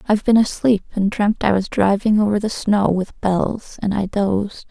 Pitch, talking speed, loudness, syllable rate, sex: 205 Hz, 205 wpm, -18 LUFS, 4.8 syllables/s, female